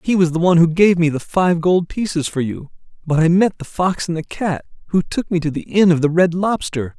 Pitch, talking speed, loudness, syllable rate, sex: 170 Hz, 265 wpm, -17 LUFS, 5.4 syllables/s, male